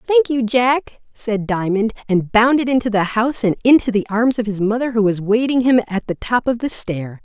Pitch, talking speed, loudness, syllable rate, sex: 225 Hz, 225 wpm, -17 LUFS, 5.2 syllables/s, female